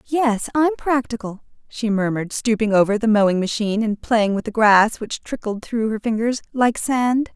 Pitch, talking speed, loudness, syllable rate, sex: 225 Hz, 180 wpm, -19 LUFS, 4.8 syllables/s, female